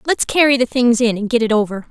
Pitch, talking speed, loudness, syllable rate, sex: 235 Hz, 285 wpm, -15 LUFS, 6.2 syllables/s, female